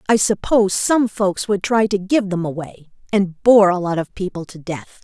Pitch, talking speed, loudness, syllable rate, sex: 195 Hz, 215 wpm, -18 LUFS, 4.9 syllables/s, female